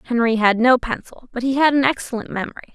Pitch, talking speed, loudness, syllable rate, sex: 245 Hz, 220 wpm, -19 LUFS, 6.9 syllables/s, female